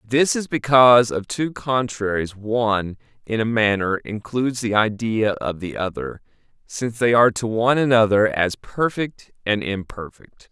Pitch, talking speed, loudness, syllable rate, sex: 115 Hz, 150 wpm, -20 LUFS, 4.6 syllables/s, male